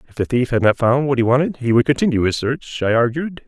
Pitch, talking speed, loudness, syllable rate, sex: 130 Hz, 275 wpm, -18 LUFS, 6.1 syllables/s, male